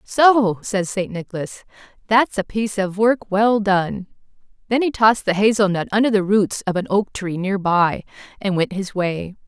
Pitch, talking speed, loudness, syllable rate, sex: 200 Hz, 190 wpm, -19 LUFS, 4.7 syllables/s, female